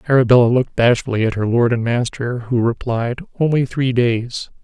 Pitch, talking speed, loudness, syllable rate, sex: 120 Hz, 170 wpm, -17 LUFS, 5.3 syllables/s, male